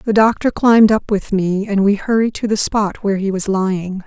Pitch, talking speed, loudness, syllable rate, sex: 205 Hz, 235 wpm, -16 LUFS, 5.2 syllables/s, female